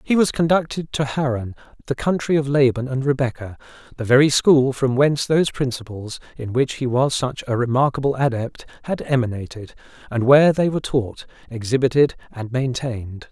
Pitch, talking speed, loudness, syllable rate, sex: 130 Hz, 160 wpm, -20 LUFS, 5.5 syllables/s, male